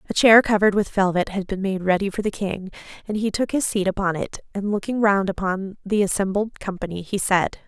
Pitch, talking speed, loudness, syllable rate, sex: 195 Hz, 220 wpm, -22 LUFS, 5.7 syllables/s, female